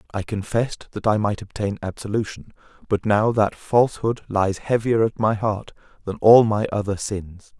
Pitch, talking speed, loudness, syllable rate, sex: 105 Hz, 165 wpm, -21 LUFS, 4.9 syllables/s, male